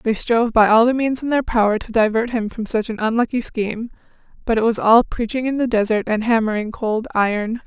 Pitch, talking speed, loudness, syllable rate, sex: 225 Hz, 225 wpm, -18 LUFS, 5.8 syllables/s, female